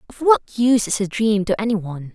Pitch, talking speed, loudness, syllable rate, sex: 205 Hz, 250 wpm, -19 LUFS, 6.2 syllables/s, female